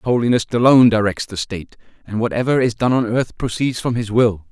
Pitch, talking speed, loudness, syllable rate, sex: 115 Hz, 215 wpm, -17 LUFS, 6.2 syllables/s, male